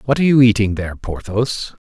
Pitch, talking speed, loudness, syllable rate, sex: 115 Hz, 195 wpm, -17 LUFS, 6.0 syllables/s, male